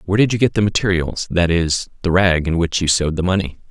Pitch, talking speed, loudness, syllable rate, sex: 90 Hz, 260 wpm, -17 LUFS, 6.6 syllables/s, male